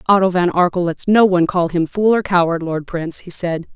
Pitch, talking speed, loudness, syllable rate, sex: 180 Hz, 240 wpm, -17 LUFS, 5.7 syllables/s, female